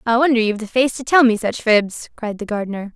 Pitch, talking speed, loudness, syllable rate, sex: 225 Hz, 265 wpm, -18 LUFS, 6.1 syllables/s, female